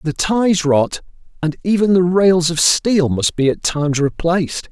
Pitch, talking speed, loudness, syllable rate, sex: 170 Hz, 180 wpm, -16 LUFS, 4.3 syllables/s, male